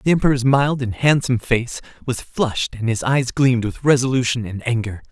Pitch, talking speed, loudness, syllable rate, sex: 125 Hz, 190 wpm, -19 LUFS, 5.6 syllables/s, male